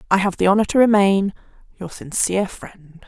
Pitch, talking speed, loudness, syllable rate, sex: 195 Hz, 175 wpm, -18 LUFS, 5.3 syllables/s, female